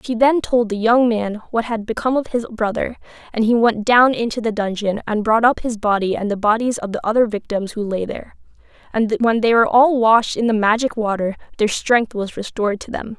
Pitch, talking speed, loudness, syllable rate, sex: 225 Hz, 225 wpm, -18 LUFS, 5.5 syllables/s, female